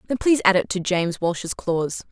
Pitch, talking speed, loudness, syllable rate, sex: 190 Hz, 225 wpm, -21 LUFS, 5.9 syllables/s, female